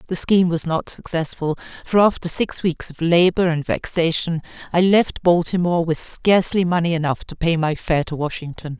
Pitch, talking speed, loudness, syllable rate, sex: 170 Hz, 175 wpm, -19 LUFS, 5.2 syllables/s, female